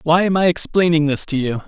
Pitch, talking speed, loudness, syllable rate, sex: 160 Hz, 250 wpm, -17 LUFS, 5.7 syllables/s, male